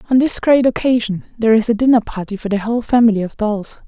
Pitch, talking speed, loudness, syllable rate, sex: 225 Hz, 230 wpm, -16 LUFS, 6.6 syllables/s, female